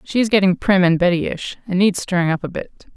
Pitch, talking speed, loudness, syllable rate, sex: 185 Hz, 245 wpm, -18 LUFS, 5.9 syllables/s, female